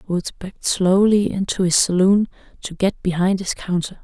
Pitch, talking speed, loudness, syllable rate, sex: 185 Hz, 165 wpm, -19 LUFS, 4.8 syllables/s, female